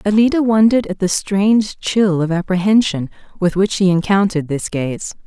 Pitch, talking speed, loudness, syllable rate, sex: 195 Hz, 160 wpm, -16 LUFS, 5.3 syllables/s, female